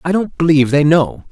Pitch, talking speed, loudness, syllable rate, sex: 155 Hz, 225 wpm, -13 LUFS, 6.0 syllables/s, male